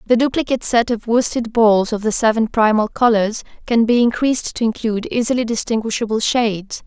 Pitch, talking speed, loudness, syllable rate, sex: 230 Hz, 165 wpm, -17 LUFS, 5.7 syllables/s, female